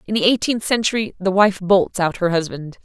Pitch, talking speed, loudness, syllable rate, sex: 195 Hz, 210 wpm, -18 LUFS, 5.4 syllables/s, female